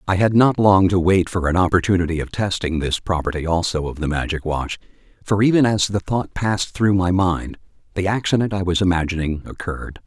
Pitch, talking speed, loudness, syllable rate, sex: 90 Hz, 195 wpm, -19 LUFS, 5.6 syllables/s, male